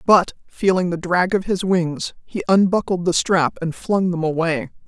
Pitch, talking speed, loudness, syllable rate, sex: 175 Hz, 185 wpm, -19 LUFS, 4.5 syllables/s, female